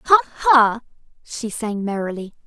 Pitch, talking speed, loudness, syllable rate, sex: 215 Hz, 120 wpm, -19 LUFS, 4.7 syllables/s, female